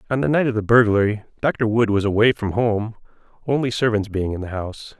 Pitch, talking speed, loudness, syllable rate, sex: 110 Hz, 215 wpm, -20 LUFS, 5.9 syllables/s, male